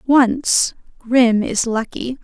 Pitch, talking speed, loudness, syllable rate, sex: 240 Hz, 105 wpm, -17 LUFS, 2.7 syllables/s, female